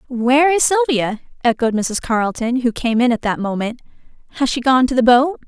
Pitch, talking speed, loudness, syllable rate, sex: 250 Hz, 195 wpm, -17 LUFS, 5.5 syllables/s, female